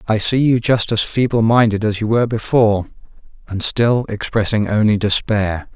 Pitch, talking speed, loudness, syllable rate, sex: 110 Hz, 165 wpm, -16 LUFS, 5.1 syllables/s, male